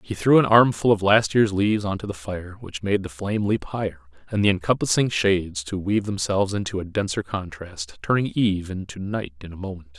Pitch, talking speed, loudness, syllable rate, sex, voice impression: 95 Hz, 215 wpm, -22 LUFS, 5.7 syllables/s, male, masculine, adult-like, slightly tensed, clear, fluent, slightly cool, intellectual, slightly refreshing, sincere, calm, mature, slightly wild, kind